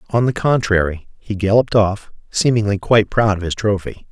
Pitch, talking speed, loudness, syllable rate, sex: 105 Hz, 175 wpm, -17 LUFS, 5.6 syllables/s, male